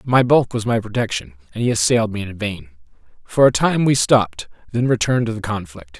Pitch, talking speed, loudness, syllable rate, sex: 115 Hz, 210 wpm, -18 LUFS, 5.9 syllables/s, male